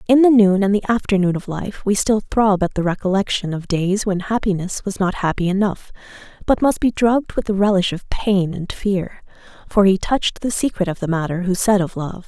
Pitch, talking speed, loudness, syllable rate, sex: 195 Hz, 220 wpm, -18 LUFS, 5.4 syllables/s, female